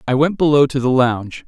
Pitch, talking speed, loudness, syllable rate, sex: 135 Hz, 245 wpm, -16 LUFS, 6.0 syllables/s, male